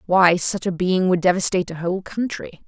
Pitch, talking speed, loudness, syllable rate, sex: 180 Hz, 200 wpm, -20 LUFS, 5.6 syllables/s, female